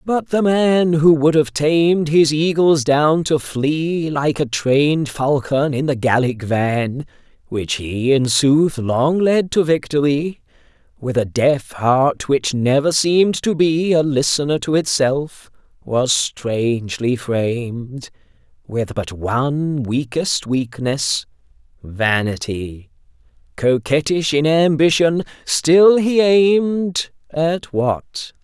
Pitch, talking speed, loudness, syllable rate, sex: 145 Hz, 120 wpm, -17 LUFS, 3.4 syllables/s, male